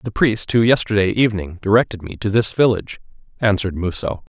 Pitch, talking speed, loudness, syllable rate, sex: 105 Hz, 165 wpm, -18 LUFS, 6.1 syllables/s, male